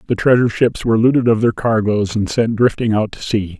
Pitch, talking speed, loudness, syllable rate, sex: 110 Hz, 235 wpm, -16 LUFS, 5.9 syllables/s, male